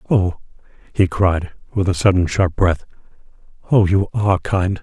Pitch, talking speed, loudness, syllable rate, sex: 95 Hz, 150 wpm, -18 LUFS, 4.6 syllables/s, male